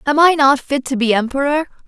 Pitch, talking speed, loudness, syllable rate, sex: 275 Hz, 225 wpm, -15 LUFS, 5.6 syllables/s, female